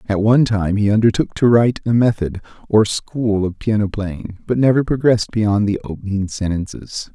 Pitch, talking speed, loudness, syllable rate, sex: 105 Hz, 175 wpm, -17 LUFS, 5.2 syllables/s, male